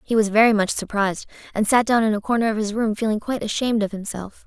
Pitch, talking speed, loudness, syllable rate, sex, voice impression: 215 Hz, 255 wpm, -21 LUFS, 6.8 syllables/s, female, feminine, young, tensed, powerful, slightly bright, clear, fluent, nasal, cute, intellectual, friendly, unique, lively, slightly light